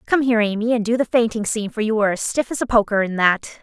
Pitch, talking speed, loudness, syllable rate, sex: 220 Hz, 300 wpm, -19 LUFS, 6.9 syllables/s, female